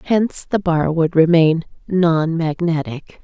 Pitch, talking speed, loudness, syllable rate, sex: 165 Hz, 130 wpm, -17 LUFS, 3.9 syllables/s, female